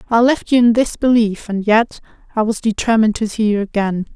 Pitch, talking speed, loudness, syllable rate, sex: 220 Hz, 215 wpm, -16 LUFS, 5.7 syllables/s, female